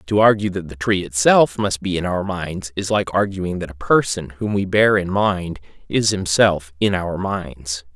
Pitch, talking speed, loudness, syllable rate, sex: 95 Hz, 205 wpm, -19 LUFS, 4.3 syllables/s, male